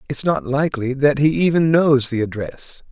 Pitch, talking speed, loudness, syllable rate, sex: 140 Hz, 185 wpm, -18 LUFS, 4.9 syllables/s, male